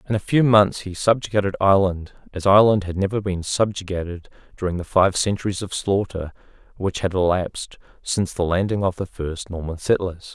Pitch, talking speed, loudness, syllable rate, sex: 95 Hz, 175 wpm, -21 LUFS, 5.7 syllables/s, male